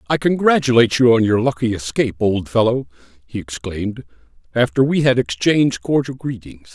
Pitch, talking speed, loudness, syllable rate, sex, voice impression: 115 Hz, 150 wpm, -17 LUFS, 5.7 syllables/s, male, masculine, old, thick, tensed, powerful, slightly hard, muffled, raspy, slightly calm, mature, slightly friendly, wild, lively, strict, intense, sharp